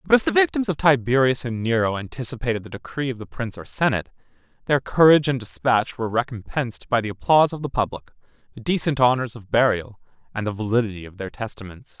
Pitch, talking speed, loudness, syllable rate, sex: 120 Hz, 195 wpm, -22 LUFS, 6.5 syllables/s, male